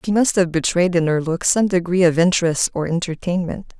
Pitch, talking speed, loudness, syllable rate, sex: 175 Hz, 205 wpm, -18 LUFS, 5.5 syllables/s, female